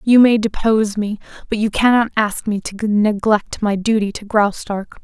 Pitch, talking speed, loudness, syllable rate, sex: 210 Hz, 180 wpm, -17 LUFS, 4.6 syllables/s, female